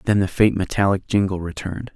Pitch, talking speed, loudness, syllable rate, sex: 100 Hz, 185 wpm, -21 LUFS, 6.1 syllables/s, male